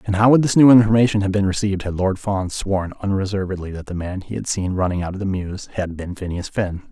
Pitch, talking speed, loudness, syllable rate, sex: 95 Hz, 250 wpm, -20 LUFS, 6.1 syllables/s, male